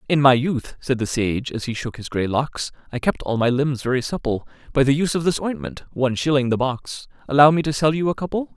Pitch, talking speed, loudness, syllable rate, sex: 135 Hz, 245 wpm, -21 LUFS, 5.8 syllables/s, male